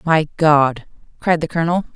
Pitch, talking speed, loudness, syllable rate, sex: 160 Hz, 155 wpm, -17 LUFS, 5.2 syllables/s, female